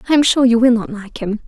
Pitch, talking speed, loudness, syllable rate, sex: 235 Hz, 325 wpm, -15 LUFS, 6.5 syllables/s, female